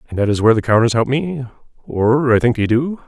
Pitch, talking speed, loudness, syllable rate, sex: 120 Hz, 235 wpm, -16 LUFS, 6.2 syllables/s, male